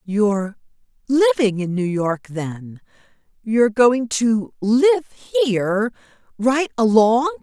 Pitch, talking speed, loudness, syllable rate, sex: 230 Hz, 95 wpm, -19 LUFS, 3.6 syllables/s, female